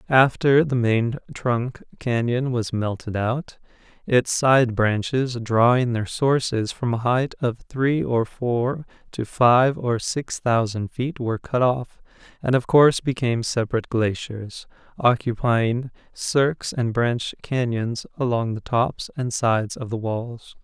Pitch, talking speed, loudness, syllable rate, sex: 120 Hz, 145 wpm, -22 LUFS, 3.9 syllables/s, male